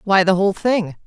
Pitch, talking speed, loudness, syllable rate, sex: 195 Hz, 225 wpm, -17 LUFS, 5.6 syllables/s, female